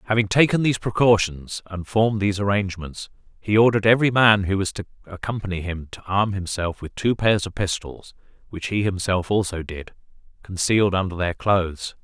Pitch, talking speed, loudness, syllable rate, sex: 100 Hz, 170 wpm, -21 LUFS, 5.7 syllables/s, male